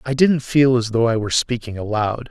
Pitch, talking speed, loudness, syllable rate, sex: 120 Hz, 235 wpm, -18 LUFS, 5.4 syllables/s, male